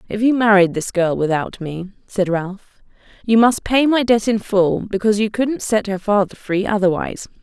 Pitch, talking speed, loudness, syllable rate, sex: 205 Hz, 195 wpm, -18 LUFS, 4.9 syllables/s, female